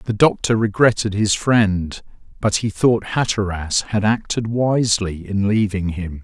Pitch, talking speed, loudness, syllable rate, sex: 105 Hz, 145 wpm, -19 LUFS, 4.1 syllables/s, male